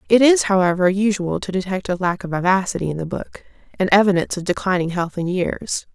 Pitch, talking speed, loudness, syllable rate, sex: 185 Hz, 200 wpm, -19 LUFS, 6.0 syllables/s, female